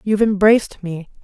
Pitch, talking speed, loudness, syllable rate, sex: 200 Hz, 145 wpm, -15 LUFS, 5.8 syllables/s, female